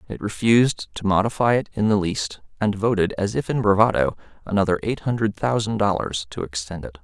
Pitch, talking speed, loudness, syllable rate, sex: 100 Hz, 190 wpm, -22 LUFS, 5.7 syllables/s, male